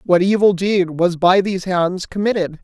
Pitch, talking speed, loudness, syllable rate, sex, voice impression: 185 Hz, 180 wpm, -17 LUFS, 4.8 syllables/s, male, very masculine, slightly old, tensed, slightly powerful, bright, slightly soft, clear, fluent, slightly raspy, slightly cool, intellectual, refreshing, sincere, slightly calm, slightly friendly, slightly reassuring, very unique, slightly elegant, wild, slightly sweet, very lively, kind, intense, slightly sharp